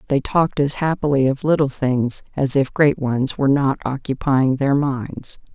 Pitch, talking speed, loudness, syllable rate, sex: 135 Hz, 175 wpm, -19 LUFS, 4.5 syllables/s, female